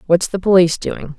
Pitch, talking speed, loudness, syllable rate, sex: 175 Hz, 200 wpm, -16 LUFS, 5.8 syllables/s, female